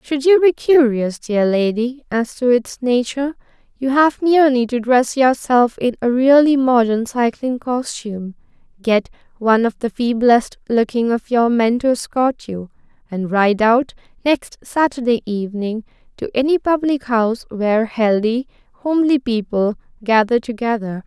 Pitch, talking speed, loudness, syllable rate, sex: 245 Hz, 140 wpm, -17 LUFS, 4.6 syllables/s, female